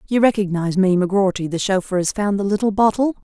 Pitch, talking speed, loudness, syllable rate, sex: 200 Hz, 200 wpm, -19 LUFS, 6.6 syllables/s, female